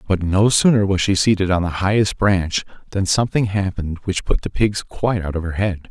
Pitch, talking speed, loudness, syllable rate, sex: 95 Hz, 225 wpm, -19 LUFS, 5.6 syllables/s, male